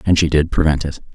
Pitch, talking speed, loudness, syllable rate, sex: 75 Hz, 260 wpm, -17 LUFS, 6.5 syllables/s, male